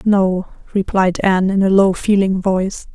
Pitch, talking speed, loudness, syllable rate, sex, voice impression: 190 Hz, 165 wpm, -16 LUFS, 4.7 syllables/s, female, very feminine, middle-aged, thin, slightly tensed, slightly weak, slightly dark, hard, clear, fluent, slightly raspy, slightly cool, intellectual, refreshing, slightly sincere, calm, friendly, slightly reassuring, unique, elegant, slightly wild, slightly sweet, lively, slightly kind, slightly intense, sharp, slightly modest